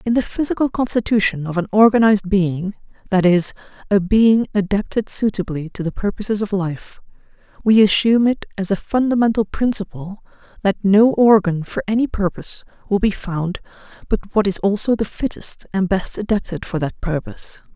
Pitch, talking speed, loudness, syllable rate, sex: 205 Hz, 160 wpm, -18 LUFS, 5.3 syllables/s, female